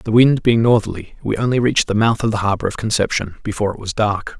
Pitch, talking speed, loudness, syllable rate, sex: 110 Hz, 245 wpm, -17 LUFS, 6.4 syllables/s, male